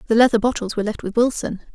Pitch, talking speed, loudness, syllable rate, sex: 225 Hz, 240 wpm, -20 LUFS, 7.6 syllables/s, female